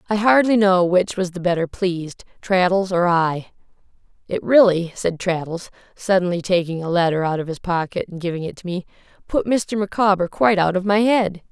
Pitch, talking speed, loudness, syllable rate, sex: 185 Hz, 190 wpm, -19 LUFS, 5.3 syllables/s, female